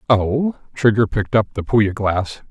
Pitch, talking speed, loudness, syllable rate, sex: 110 Hz, 165 wpm, -18 LUFS, 4.6 syllables/s, male